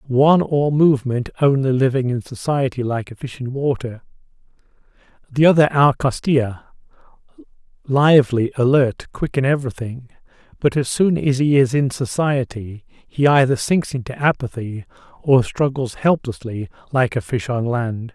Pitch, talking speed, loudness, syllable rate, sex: 130 Hz, 140 wpm, -18 LUFS, 4.7 syllables/s, male